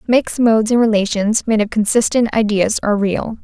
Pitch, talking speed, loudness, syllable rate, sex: 215 Hz, 175 wpm, -15 LUFS, 5.5 syllables/s, female